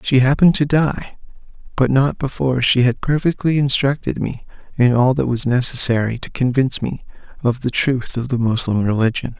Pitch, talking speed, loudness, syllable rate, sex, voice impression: 130 Hz, 170 wpm, -17 LUFS, 5.5 syllables/s, male, masculine, adult-like, slightly weak, slightly muffled, slightly cool, slightly refreshing, sincere, calm